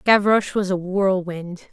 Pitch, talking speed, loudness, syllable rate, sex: 190 Hz, 140 wpm, -20 LUFS, 4.4 syllables/s, female